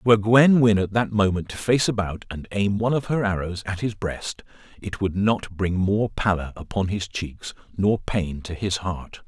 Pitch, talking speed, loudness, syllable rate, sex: 100 Hz, 205 wpm, -23 LUFS, 4.6 syllables/s, male